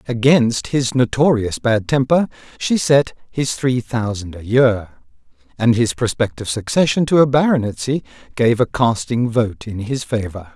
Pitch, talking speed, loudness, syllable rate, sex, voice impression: 120 Hz, 150 wpm, -18 LUFS, 4.5 syllables/s, male, masculine, adult-like, slightly bright, refreshing, slightly sincere, friendly, reassuring, slightly kind